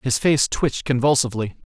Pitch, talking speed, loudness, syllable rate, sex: 125 Hz, 140 wpm, -20 LUFS, 6.2 syllables/s, male